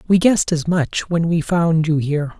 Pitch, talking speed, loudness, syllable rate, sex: 165 Hz, 225 wpm, -18 LUFS, 4.9 syllables/s, male